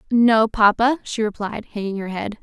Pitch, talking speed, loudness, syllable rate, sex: 220 Hz, 175 wpm, -20 LUFS, 4.7 syllables/s, female